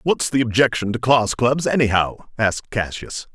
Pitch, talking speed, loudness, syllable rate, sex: 120 Hz, 160 wpm, -19 LUFS, 4.8 syllables/s, male